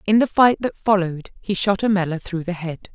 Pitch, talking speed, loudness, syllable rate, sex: 190 Hz, 225 wpm, -20 LUFS, 5.5 syllables/s, female